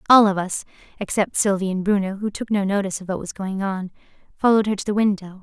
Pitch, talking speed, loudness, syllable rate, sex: 195 Hz, 230 wpm, -21 LUFS, 3.2 syllables/s, female